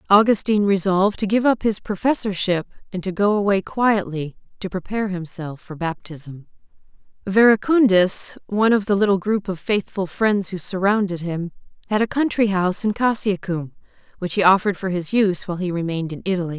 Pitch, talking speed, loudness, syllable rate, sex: 195 Hz, 165 wpm, -20 LUFS, 5.6 syllables/s, female